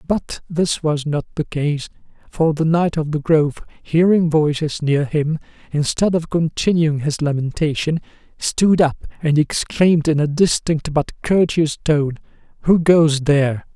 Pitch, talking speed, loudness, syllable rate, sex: 155 Hz, 150 wpm, -18 LUFS, 4.2 syllables/s, male